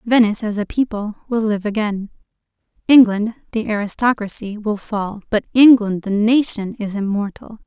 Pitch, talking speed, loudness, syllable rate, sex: 215 Hz, 140 wpm, -18 LUFS, 4.9 syllables/s, female